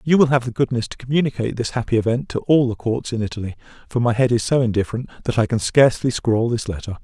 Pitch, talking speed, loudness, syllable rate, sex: 120 Hz, 245 wpm, -20 LUFS, 6.9 syllables/s, male